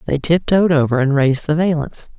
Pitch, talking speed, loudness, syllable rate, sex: 155 Hz, 190 wpm, -16 LUFS, 6.0 syllables/s, female